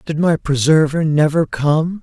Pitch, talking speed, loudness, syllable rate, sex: 155 Hz, 150 wpm, -16 LUFS, 4.2 syllables/s, male